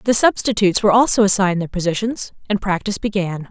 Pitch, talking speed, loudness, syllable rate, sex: 200 Hz, 170 wpm, -17 LUFS, 6.6 syllables/s, female